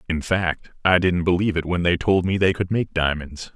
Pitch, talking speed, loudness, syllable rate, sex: 90 Hz, 235 wpm, -21 LUFS, 5.2 syllables/s, male